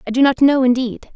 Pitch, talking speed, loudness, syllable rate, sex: 255 Hz, 260 wpm, -15 LUFS, 6.1 syllables/s, female